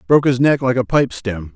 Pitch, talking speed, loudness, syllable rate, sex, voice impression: 125 Hz, 270 wpm, -17 LUFS, 5.8 syllables/s, male, masculine, adult-like, tensed, powerful, clear, fluent, cool, intellectual, slightly mature, wild, lively, slightly strict